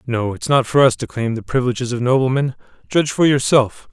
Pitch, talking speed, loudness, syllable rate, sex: 125 Hz, 215 wpm, -17 LUFS, 6.1 syllables/s, male